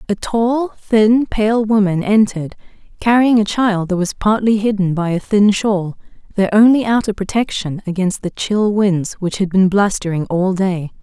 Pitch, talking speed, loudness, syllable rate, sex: 200 Hz, 170 wpm, -16 LUFS, 4.5 syllables/s, female